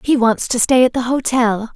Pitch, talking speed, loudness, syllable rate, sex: 245 Hz, 240 wpm, -15 LUFS, 4.9 syllables/s, female